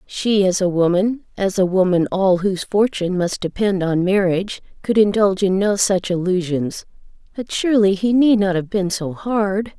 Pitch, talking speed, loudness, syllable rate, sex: 195 Hz, 165 wpm, -18 LUFS, 4.9 syllables/s, female